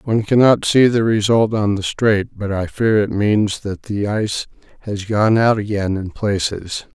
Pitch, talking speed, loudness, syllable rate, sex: 105 Hz, 190 wpm, -17 LUFS, 4.4 syllables/s, male